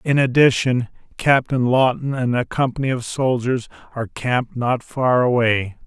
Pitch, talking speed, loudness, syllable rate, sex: 125 Hz, 145 wpm, -19 LUFS, 4.7 syllables/s, male